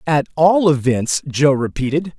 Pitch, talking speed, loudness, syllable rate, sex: 150 Hz, 135 wpm, -16 LUFS, 4.2 syllables/s, male